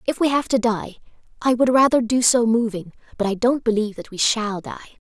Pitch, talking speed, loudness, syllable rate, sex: 230 Hz, 225 wpm, -20 LUFS, 5.8 syllables/s, female